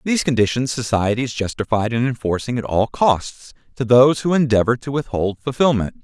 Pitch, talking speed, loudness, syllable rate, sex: 120 Hz, 170 wpm, -19 LUFS, 5.7 syllables/s, male